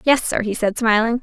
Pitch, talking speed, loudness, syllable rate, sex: 230 Hz, 245 wpm, -18 LUFS, 5.4 syllables/s, female